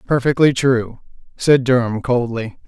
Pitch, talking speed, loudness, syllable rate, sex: 125 Hz, 110 wpm, -17 LUFS, 4.3 syllables/s, male